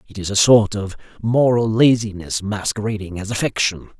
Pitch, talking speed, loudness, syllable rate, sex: 105 Hz, 150 wpm, -18 LUFS, 5.1 syllables/s, male